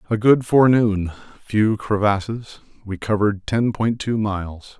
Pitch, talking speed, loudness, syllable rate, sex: 105 Hz, 140 wpm, -19 LUFS, 4.5 syllables/s, male